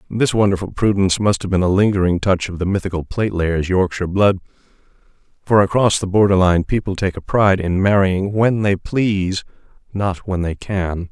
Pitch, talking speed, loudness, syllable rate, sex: 95 Hz, 175 wpm, -17 LUFS, 5.6 syllables/s, male